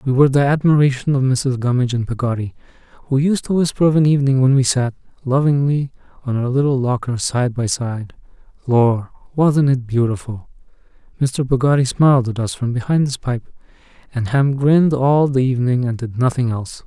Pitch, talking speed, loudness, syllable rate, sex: 130 Hz, 180 wpm, -17 LUFS, 5.6 syllables/s, male